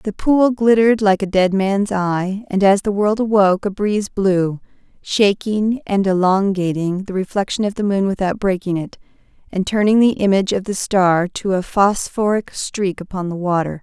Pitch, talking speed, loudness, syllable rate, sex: 195 Hz, 180 wpm, -17 LUFS, 4.8 syllables/s, female